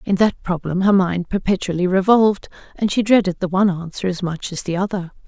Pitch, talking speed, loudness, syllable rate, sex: 185 Hz, 205 wpm, -19 LUFS, 5.9 syllables/s, female